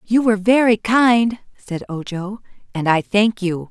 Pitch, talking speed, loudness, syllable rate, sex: 210 Hz, 160 wpm, -17 LUFS, 4.4 syllables/s, female